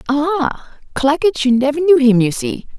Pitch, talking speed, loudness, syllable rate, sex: 280 Hz, 150 wpm, -15 LUFS, 4.4 syllables/s, female